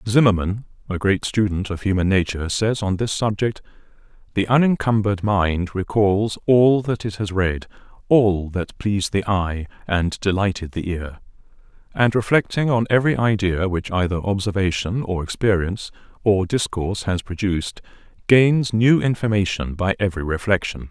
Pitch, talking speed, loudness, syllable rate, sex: 100 Hz, 140 wpm, -20 LUFS, 5.0 syllables/s, male